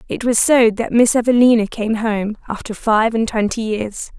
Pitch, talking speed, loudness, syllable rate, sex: 225 Hz, 185 wpm, -16 LUFS, 4.7 syllables/s, female